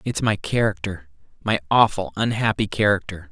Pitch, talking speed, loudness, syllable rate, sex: 100 Hz, 125 wpm, -21 LUFS, 5.1 syllables/s, male